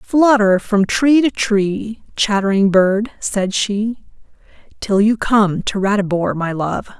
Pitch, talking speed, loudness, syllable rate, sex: 205 Hz, 135 wpm, -16 LUFS, 3.6 syllables/s, female